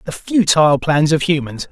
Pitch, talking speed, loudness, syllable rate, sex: 160 Hz, 175 wpm, -15 LUFS, 5.1 syllables/s, male